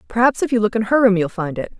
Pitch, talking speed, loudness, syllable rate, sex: 220 Hz, 335 wpm, -18 LUFS, 6.9 syllables/s, female